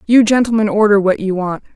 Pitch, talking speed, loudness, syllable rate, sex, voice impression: 210 Hz, 205 wpm, -14 LUFS, 5.9 syllables/s, female, feminine, slightly adult-like, slightly muffled, slightly fluent, slightly calm, slightly sweet